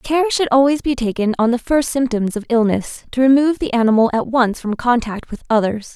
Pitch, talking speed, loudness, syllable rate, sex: 245 Hz, 210 wpm, -17 LUFS, 5.4 syllables/s, female